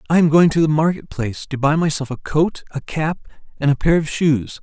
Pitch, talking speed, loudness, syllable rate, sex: 150 Hz, 245 wpm, -18 LUFS, 5.6 syllables/s, male